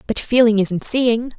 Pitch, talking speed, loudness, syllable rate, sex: 225 Hz, 175 wpm, -17 LUFS, 4.1 syllables/s, female